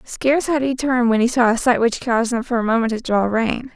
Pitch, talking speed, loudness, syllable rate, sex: 240 Hz, 285 wpm, -18 LUFS, 6.0 syllables/s, female